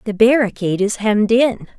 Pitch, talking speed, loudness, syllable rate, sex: 220 Hz, 170 wpm, -16 LUFS, 5.8 syllables/s, female